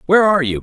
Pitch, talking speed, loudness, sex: 170 Hz, 290 wpm, -14 LUFS, male